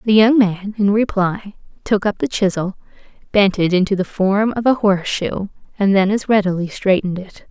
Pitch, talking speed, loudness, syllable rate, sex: 200 Hz, 185 wpm, -17 LUFS, 5.1 syllables/s, female